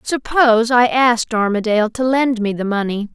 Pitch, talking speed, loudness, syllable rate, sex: 230 Hz, 170 wpm, -16 LUFS, 5.3 syllables/s, female